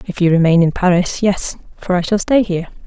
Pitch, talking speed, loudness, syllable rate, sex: 185 Hz, 230 wpm, -15 LUFS, 5.8 syllables/s, female